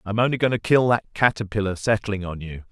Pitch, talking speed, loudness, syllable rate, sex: 105 Hz, 245 wpm, -22 LUFS, 6.2 syllables/s, male